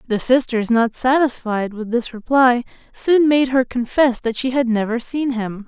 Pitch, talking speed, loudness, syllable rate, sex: 245 Hz, 180 wpm, -18 LUFS, 4.4 syllables/s, female